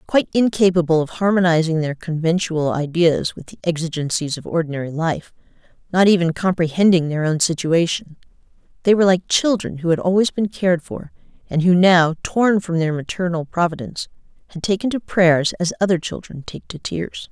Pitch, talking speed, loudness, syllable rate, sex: 175 Hz, 165 wpm, -19 LUFS, 5.5 syllables/s, female